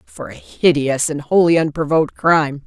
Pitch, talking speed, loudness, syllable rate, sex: 155 Hz, 155 wpm, -16 LUFS, 5.1 syllables/s, female